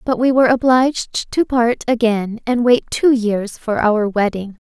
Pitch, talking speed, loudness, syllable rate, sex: 235 Hz, 180 wpm, -16 LUFS, 4.4 syllables/s, female